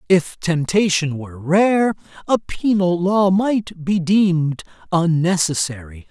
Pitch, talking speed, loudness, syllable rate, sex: 175 Hz, 110 wpm, -18 LUFS, 3.8 syllables/s, male